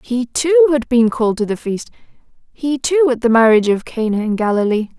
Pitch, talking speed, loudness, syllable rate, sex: 245 Hz, 205 wpm, -15 LUFS, 6.1 syllables/s, female